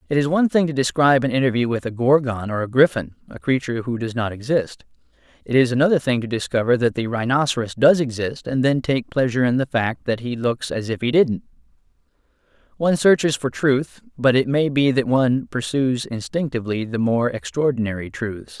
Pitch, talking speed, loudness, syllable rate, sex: 130 Hz, 195 wpm, -20 LUFS, 5.8 syllables/s, male